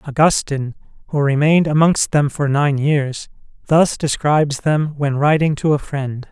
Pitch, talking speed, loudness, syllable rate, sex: 145 Hz, 150 wpm, -17 LUFS, 4.7 syllables/s, male